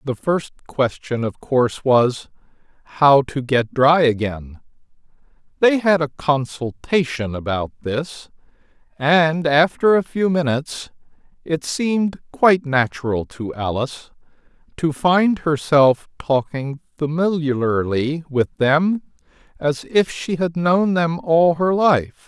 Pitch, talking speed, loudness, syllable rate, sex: 150 Hz, 120 wpm, -19 LUFS, 3.7 syllables/s, male